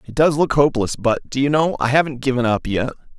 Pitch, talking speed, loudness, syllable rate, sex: 135 Hz, 245 wpm, -18 LUFS, 6.0 syllables/s, male